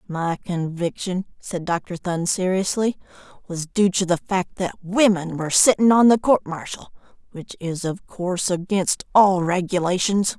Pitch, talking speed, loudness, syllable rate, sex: 185 Hz, 150 wpm, -21 LUFS, 4.4 syllables/s, female